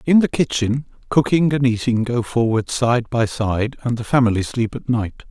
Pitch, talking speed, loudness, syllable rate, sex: 120 Hz, 190 wpm, -19 LUFS, 4.7 syllables/s, male